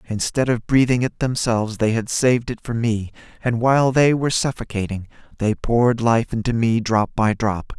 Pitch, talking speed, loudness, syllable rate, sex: 115 Hz, 185 wpm, -20 LUFS, 5.2 syllables/s, male